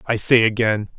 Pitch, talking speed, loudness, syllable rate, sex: 110 Hz, 180 wpm, -17 LUFS, 5.0 syllables/s, male